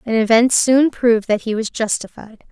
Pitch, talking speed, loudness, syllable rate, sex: 230 Hz, 190 wpm, -16 LUFS, 5.0 syllables/s, female